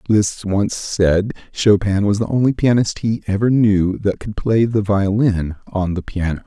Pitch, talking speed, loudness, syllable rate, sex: 105 Hz, 175 wpm, -18 LUFS, 4.2 syllables/s, male